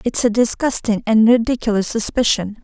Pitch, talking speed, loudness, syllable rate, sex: 225 Hz, 135 wpm, -16 LUFS, 5.3 syllables/s, female